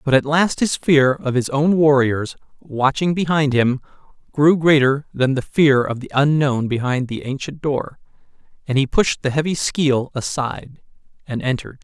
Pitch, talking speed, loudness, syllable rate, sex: 140 Hz, 165 wpm, -18 LUFS, 4.6 syllables/s, male